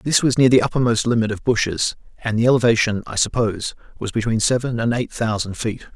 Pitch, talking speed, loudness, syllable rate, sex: 115 Hz, 200 wpm, -19 LUFS, 6.0 syllables/s, male